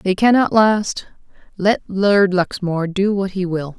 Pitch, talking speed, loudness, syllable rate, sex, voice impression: 195 Hz, 145 wpm, -17 LUFS, 4.1 syllables/s, female, very feminine, very adult-like, slightly thin, tensed, slightly weak, slightly dark, soft, clear, fluent, slightly raspy, cute, intellectual, very refreshing, sincere, very calm, friendly, reassuring, unique, very elegant, wild, slightly sweet, lively, kind, slightly modest